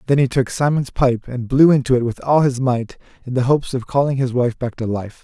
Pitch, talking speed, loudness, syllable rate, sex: 130 Hz, 265 wpm, -18 LUFS, 5.7 syllables/s, male